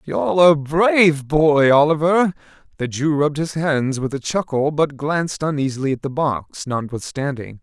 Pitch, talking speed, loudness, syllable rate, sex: 150 Hz, 155 wpm, -18 LUFS, 4.7 syllables/s, male